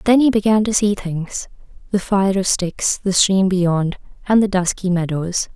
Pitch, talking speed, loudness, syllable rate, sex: 190 Hz, 175 wpm, -18 LUFS, 4.3 syllables/s, female